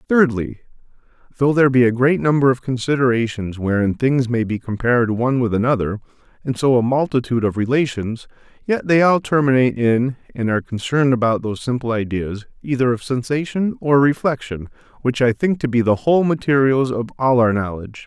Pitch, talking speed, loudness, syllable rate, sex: 125 Hz, 175 wpm, -18 LUFS, 5.8 syllables/s, male